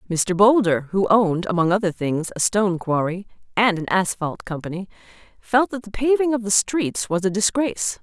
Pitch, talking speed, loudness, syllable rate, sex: 200 Hz, 180 wpm, -20 LUFS, 5.2 syllables/s, female